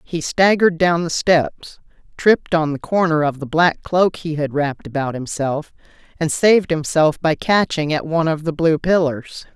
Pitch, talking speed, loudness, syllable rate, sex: 160 Hz, 180 wpm, -18 LUFS, 4.8 syllables/s, female